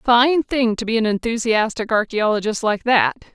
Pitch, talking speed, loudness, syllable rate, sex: 225 Hz, 160 wpm, -19 LUFS, 4.6 syllables/s, female